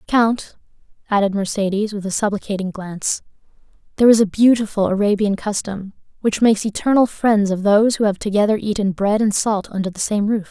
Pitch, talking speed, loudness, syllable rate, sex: 205 Hz, 170 wpm, -18 LUFS, 5.8 syllables/s, female